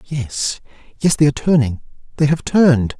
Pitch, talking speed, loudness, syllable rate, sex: 140 Hz, 140 wpm, -17 LUFS, 5.2 syllables/s, male